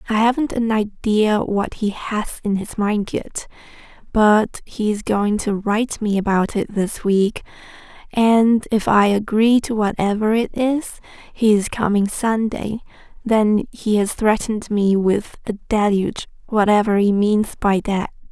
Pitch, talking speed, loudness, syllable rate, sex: 215 Hz, 150 wpm, -19 LUFS, 4.0 syllables/s, female